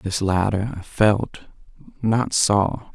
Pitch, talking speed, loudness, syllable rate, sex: 105 Hz, 100 wpm, -21 LUFS, 3.1 syllables/s, male